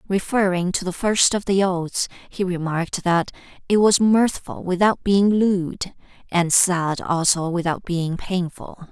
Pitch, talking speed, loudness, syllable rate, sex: 185 Hz, 150 wpm, -20 LUFS, 4.0 syllables/s, female